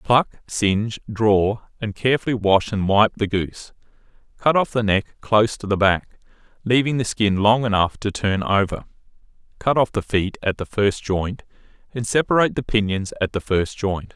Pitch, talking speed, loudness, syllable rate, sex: 105 Hz, 180 wpm, -20 LUFS, 4.9 syllables/s, male